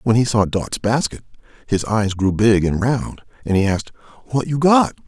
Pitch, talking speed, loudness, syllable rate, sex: 115 Hz, 200 wpm, -18 LUFS, 5.2 syllables/s, male